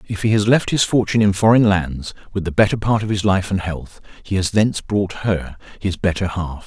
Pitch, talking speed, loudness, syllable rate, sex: 100 Hz, 235 wpm, -18 LUFS, 5.4 syllables/s, male